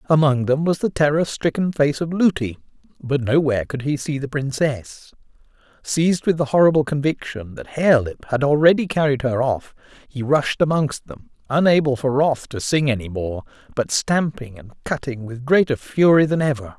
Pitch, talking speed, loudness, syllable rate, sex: 140 Hz, 170 wpm, -20 LUFS, 5.1 syllables/s, male